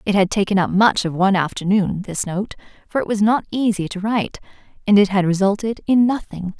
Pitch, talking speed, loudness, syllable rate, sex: 200 Hz, 210 wpm, -19 LUFS, 5.8 syllables/s, female